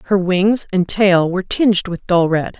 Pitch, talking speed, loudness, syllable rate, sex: 190 Hz, 210 wpm, -16 LUFS, 4.9 syllables/s, female